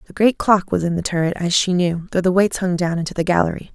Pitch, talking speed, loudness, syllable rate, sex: 180 Hz, 290 wpm, -19 LUFS, 6.4 syllables/s, female